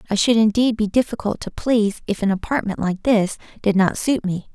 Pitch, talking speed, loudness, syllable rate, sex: 215 Hz, 210 wpm, -20 LUFS, 5.6 syllables/s, female